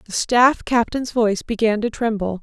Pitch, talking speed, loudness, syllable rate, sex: 225 Hz, 175 wpm, -19 LUFS, 4.8 syllables/s, female